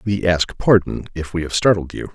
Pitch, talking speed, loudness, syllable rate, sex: 90 Hz, 225 wpm, -18 LUFS, 5.2 syllables/s, male